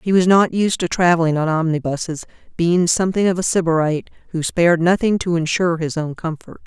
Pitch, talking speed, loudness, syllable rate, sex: 170 Hz, 190 wpm, -18 LUFS, 6.0 syllables/s, female